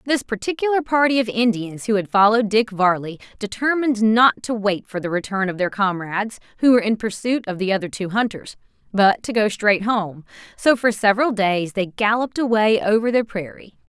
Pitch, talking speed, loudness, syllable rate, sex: 215 Hz, 190 wpm, -19 LUFS, 5.6 syllables/s, female